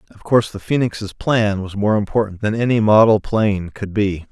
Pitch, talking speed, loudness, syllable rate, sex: 105 Hz, 195 wpm, -18 LUFS, 5.2 syllables/s, male